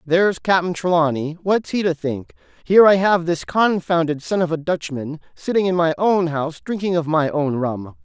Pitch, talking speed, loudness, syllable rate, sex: 170 Hz, 185 wpm, -19 LUFS, 5.0 syllables/s, male